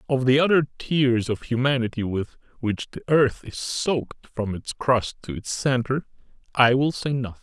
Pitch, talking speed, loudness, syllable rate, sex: 125 Hz, 180 wpm, -23 LUFS, 4.8 syllables/s, male